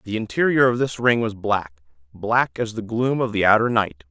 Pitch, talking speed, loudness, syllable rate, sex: 110 Hz, 220 wpm, -20 LUFS, 5.1 syllables/s, male